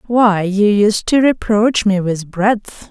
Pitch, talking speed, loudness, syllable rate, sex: 205 Hz, 165 wpm, -14 LUFS, 3.3 syllables/s, female